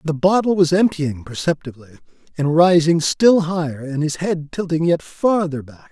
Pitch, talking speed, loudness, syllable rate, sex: 160 Hz, 160 wpm, -18 LUFS, 4.8 syllables/s, male